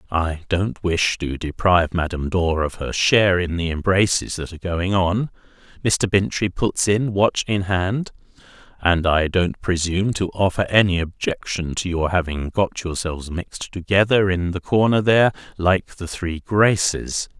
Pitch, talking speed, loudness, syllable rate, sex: 90 Hz, 160 wpm, -20 LUFS, 4.6 syllables/s, male